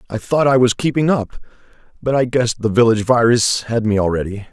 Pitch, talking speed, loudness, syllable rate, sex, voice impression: 120 Hz, 200 wpm, -16 LUFS, 5.8 syllables/s, male, very masculine, slightly old, thick, relaxed, slightly powerful, slightly dark, soft, slightly muffled, fluent, slightly raspy, cool, very intellectual, refreshing, very sincere, very calm, slightly mature, friendly, very reassuring, very unique, elegant, very wild, sweet, lively, kind, slightly modest